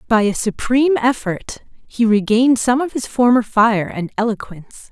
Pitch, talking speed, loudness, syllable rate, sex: 230 Hz, 160 wpm, -17 LUFS, 5.0 syllables/s, female